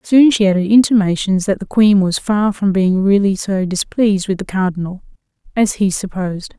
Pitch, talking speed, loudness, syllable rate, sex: 195 Hz, 180 wpm, -15 LUFS, 5.2 syllables/s, female